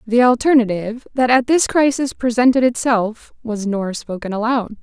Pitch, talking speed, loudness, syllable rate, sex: 235 Hz, 150 wpm, -17 LUFS, 4.9 syllables/s, female